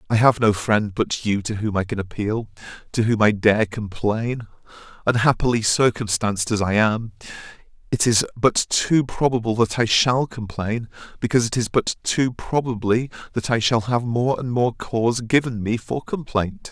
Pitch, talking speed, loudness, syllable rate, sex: 115 Hz, 170 wpm, -21 LUFS, 4.7 syllables/s, male